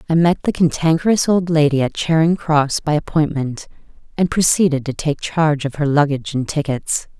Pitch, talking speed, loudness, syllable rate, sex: 150 Hz, 175 wpm, -17 LUFS, 5.3 syllables/s, female